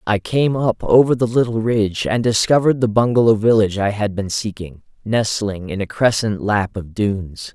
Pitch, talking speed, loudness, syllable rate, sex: 110 Hz, 185 wpm, -18 LUFS, 5.2 syllables/s, male